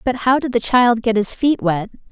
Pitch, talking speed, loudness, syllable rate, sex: 235 Hz, 255 wpm, -17 LUFS, 4.9 syllables/s, female